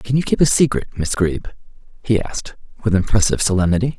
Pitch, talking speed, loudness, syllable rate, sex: 105 Hz, 180 wpm, -18 LUFS, 6.4 syllables/s, male